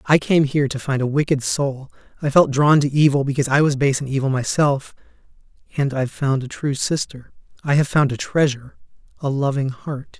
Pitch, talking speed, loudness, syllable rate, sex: 140 Hz, 190 wpm, -19 LUFS, 5.6 syllables/s, male